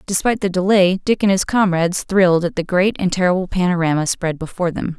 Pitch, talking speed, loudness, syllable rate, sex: 185 Hz, 205 wpm, -17 LUFS, 6.3 syllables/s, female